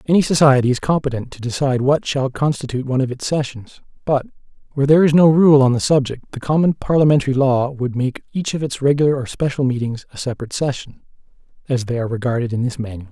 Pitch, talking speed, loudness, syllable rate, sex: 135 Hz, 205 wpm, -18 LUFS, 6.7 syllables/s, male